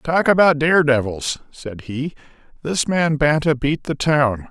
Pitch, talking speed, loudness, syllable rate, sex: 145 Hz, 145 wpm, -18 LUFS, 4.1 syllables/s, male